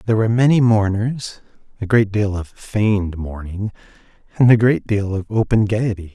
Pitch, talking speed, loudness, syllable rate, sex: 105 Hz, 165 wpm, -18 LUFS, 5.1 syllables/s, male